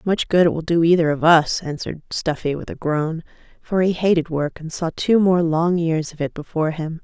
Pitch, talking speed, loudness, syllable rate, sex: 165 Hz, 230 wpm, -20 LUFS, 5.3 syllables/s, female